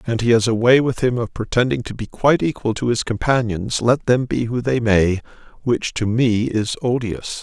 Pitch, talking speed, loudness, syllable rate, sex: 115 Hz, 220 wpm, -19 LUFS, 5.0 syllables/s, male